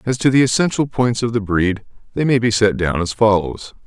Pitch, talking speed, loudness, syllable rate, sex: 110 Hz, 235 wpm, -17 LUFS, 5.4 syllables/s, male